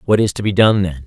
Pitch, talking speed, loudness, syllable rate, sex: 100 Hz, 335 wpm, -15 LUFS, 5.8 syllables/s, male